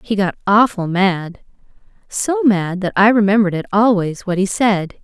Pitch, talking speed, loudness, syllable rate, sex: 200 Hz, 145 wpm, -16 LUFS, 4.6 syllables/s, female